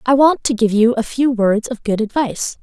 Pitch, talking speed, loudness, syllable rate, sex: 240 Hz, 250 wpm, -16 LUFS, 5.3 syllables/s, female